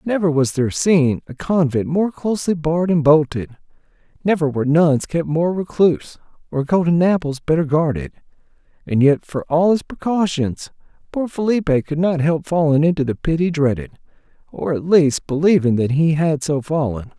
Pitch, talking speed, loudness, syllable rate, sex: 155 Hz, 165 wpm, -18 LUFS, 5.1 syllables/s, male